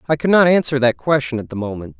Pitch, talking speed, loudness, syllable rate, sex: 130 Hz, 270 wpm, -17 LUFS, 6.6 syllables/s, male